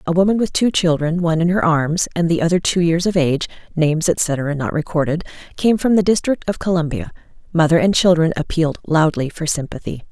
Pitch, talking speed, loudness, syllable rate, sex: 170 Hz, 195 wpm, -18 LUFS, 5.4 syllables/s, female